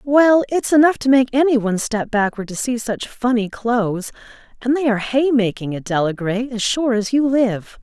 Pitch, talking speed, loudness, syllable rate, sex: 235 Hz, 200 wpm, -18 LUFS, 5.1 syllables/s, female